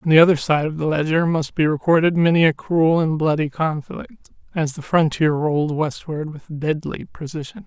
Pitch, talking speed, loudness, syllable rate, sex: 155 Hz, 190 wpm, -19 LUFS, 5.1 syllables/s, male